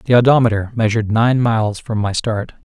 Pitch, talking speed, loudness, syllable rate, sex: 115 Hz, 175 wpm, -16 LUFS, 5.6 syllables/s, male